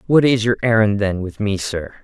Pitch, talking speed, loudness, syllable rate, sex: 105 Hz, 235 wpm, -18 LUFS, 5.1 syllables/s, male